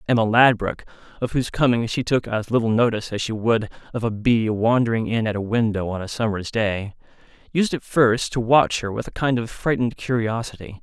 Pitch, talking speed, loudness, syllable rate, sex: 115 Hz, 205 wpm, -21 LUFS, 5.7 syllables/s, male